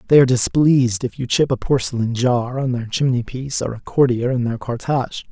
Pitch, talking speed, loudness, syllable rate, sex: 125 Hz, 215 wpm, -19 LUFS, 5.8 syllables/s, male